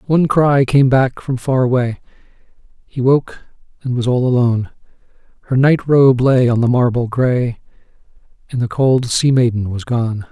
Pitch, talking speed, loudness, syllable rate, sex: 125 Hz, 165 wpm, -15 LUFS, 4.7 syllables/s, male